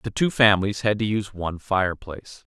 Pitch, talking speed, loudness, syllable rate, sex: 100 Hz, 190 wpm, -22 LUFS, 6.2 syllables/s, male